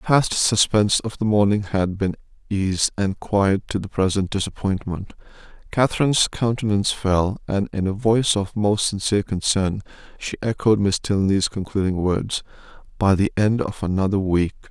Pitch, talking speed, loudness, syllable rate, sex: 100 Hz, 155 wpm, -21 LUFS, 5.0 syllables/s, male